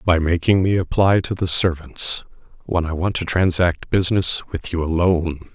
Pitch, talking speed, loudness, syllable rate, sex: 85 Hz, 175 wpm, -20 LUFS, 4.8 syllables/s, male